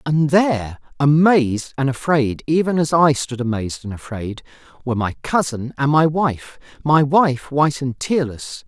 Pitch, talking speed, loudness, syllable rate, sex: 140 Hz, 150 wpm, -18 LUFS, 4.7 syllables/s, male